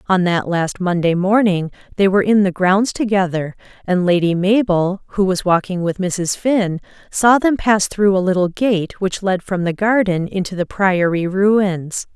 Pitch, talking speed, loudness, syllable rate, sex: 190 Hz, 180 wpm, -17 LUFS, 4.4 syllables/s, female